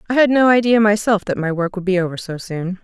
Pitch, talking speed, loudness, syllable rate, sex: 200 Hz, 275 wpm, -17 LUFS, 6.0 syllables/s, female